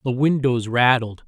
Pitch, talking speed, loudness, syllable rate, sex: 125 Hz, 140 wpm, -19 LUFS, 4.3 syllables/s, male